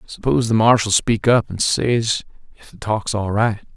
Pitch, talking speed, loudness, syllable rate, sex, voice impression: 110 Hz, 190 wpm, -18 LUFS, 4.8 syllables/s, male, masculine, middle-aged, slightly thick, tensed, powerful, slightly bright, slightly clear, slightly fluent, slightly intellectual, slightly calm, mature, friendly, reassuring, wild, slightly kind, modest